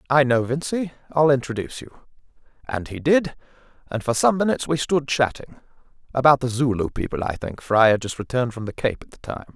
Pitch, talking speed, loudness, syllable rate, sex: 130 Hz, 200 wpm, -22 LUFS, 6.1 syllables/s, male